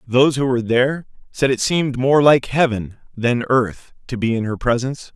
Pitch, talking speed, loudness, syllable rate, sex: 125 Hz, 200 wpm, -18 LUFS, 5.4 syllables/s, male